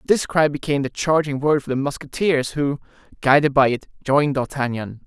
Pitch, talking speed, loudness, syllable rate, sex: 140 Hz, 180 wpm, -20 LUFS, 5.5 syllables/s, male